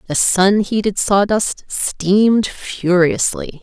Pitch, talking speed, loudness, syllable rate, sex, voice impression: 195 Hz, 100 wpm, -16 LUFS, 3.2 syllables/s, female, very feminine, slightly young, slightly adult-like, very thin, very tensed, powerful, very bright, very hard, very clear, very fluent, cool, intellectual, very refreshing, very sincere, slightly calm, slightly friendly, slightly reassuring, very unique, slightly elegant, very wild, slightly sweet, very strict, very intense, very sharp, very light